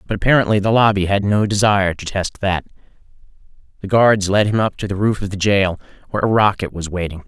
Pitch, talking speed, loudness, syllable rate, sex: 100 Hz, 215 wpm, -17 LUFS, 6.2 syllables/s, male